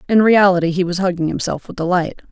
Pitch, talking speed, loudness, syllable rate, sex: 180 Hz, 205 wpm, -16 LUFS, 6.3 syllables/s, female